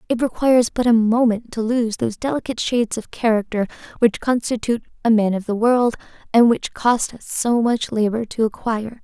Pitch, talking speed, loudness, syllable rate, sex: 230 Hz, 185 wpm, -19 LUFS, 5.5 syllables/s, female